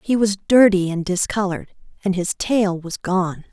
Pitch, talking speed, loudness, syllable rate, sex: 190 Hz, 170 wpm, -19 LUFS, 4.8 syllables/s, female